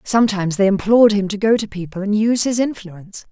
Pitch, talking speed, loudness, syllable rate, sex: 205 Hz, 215 wpm, -17 LUFS, 6.6 syllables/s, female